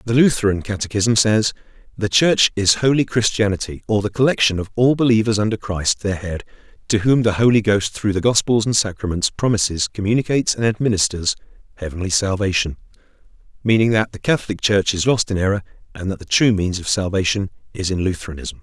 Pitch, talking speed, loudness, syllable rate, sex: 105 Hz, 175 wpm, -18 LUFS, 5.9 syllables/s, male